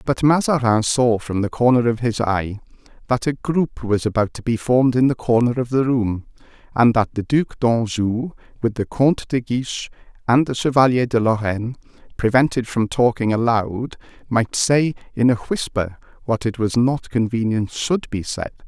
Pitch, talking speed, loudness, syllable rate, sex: 120 Hz, 175 wpm, -19 LUFS, 4.8 syllables/s, male